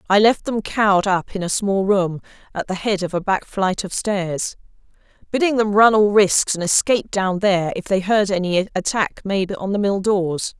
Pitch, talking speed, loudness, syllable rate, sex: 195 Hz, 210 wpm, -19 LUFS, 4.9 syllables/s, female